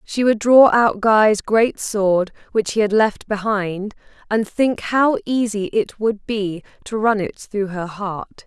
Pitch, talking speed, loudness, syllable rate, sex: 210 Hz, 175 wpm, -18 LUFS, 3.6 syllables/s, female